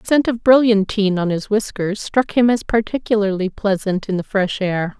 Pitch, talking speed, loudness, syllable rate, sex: 205 Hz, 190 wpm, -18 LUFS, 5.1 syllables/s, female